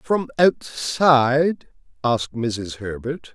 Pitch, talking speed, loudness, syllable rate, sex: 135 Hz, 90 wpm, -21 LUFS, 3.2 syllables/s, male